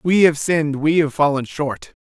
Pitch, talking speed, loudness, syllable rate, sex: 150 Hz, 205 wpm, -18 LUFS, 4.7 syllables/s, male